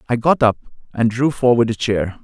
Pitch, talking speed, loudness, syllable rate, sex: 115 Hz, 215 wpm, -17 LUFS, 5.4 syllables/s, male